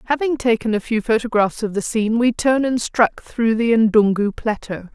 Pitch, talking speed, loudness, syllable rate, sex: 225 Hz, 195 wpm, -18 LUFS, 5.1 syllables/s, female